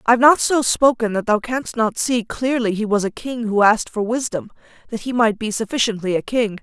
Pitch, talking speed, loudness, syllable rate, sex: 225 Hz, 225 wpm, -19 LUFS, 5.4 syllables/s, female